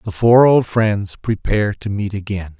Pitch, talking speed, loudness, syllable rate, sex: 105 Hz, 185 wpm, -17 LUFS, 4.6 syllables/s, male